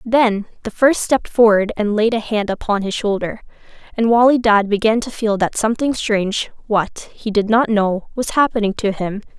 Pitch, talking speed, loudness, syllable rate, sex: 220 Hz, 180 wpm, -17 LUFS, 5.0 syllables/s, female